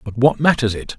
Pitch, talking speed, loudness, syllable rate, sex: 120 Hz, 245 wpm, -17 LUFS, 5.6 syllables/s, male